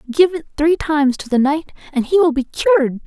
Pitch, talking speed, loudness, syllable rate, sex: 285 Hz, 235 wpm, -17 LUFS, 5.6 syllables/s, female